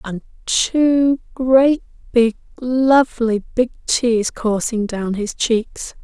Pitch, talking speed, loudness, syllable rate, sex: 240 Hz, 110 wpm, -17 LUFS, 2.9 syllables/s, female